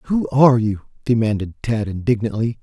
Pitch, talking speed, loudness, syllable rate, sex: 115 Hz, 135 wpm, -19 LUFS, 5.3 syllables/s, male